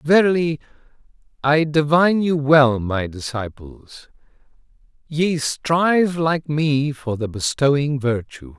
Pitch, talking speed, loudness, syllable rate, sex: 145 Hz, 105 wpm, -19 LUFS, 3.7 syllables/s, male